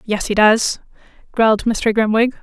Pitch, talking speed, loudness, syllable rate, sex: 220 Hz, 150 wpm, -16 LUFS, 4.5 syllables/s, female